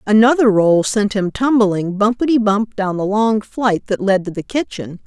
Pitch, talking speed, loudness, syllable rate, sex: 210 Hz, 190 wpm, -16 LUFS, 4.5 syllables/s, female